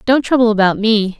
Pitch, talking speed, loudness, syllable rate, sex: 220 Hz, 200 wpm, -13 LUFS, 5.5 syllables/s, female